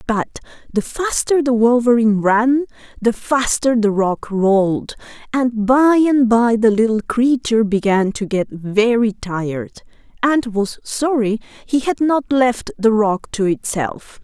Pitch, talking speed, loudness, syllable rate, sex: 230 Hz, 145 wpm, -17 LUFS, 4.0 syllables/s, female